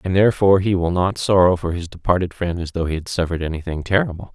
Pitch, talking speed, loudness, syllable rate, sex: 90 Hz, 235 wpm, -19 LUFS, 6.8 syllables/s, male